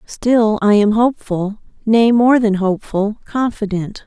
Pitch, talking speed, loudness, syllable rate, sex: 215 Hz, 120 wpm, -15 LUFS, 4.2 syllables/s, female